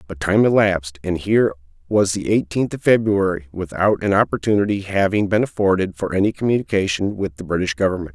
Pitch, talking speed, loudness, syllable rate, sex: 95 Hz, 170 wpm, -19 LUFS, 6.0 syllables/s, male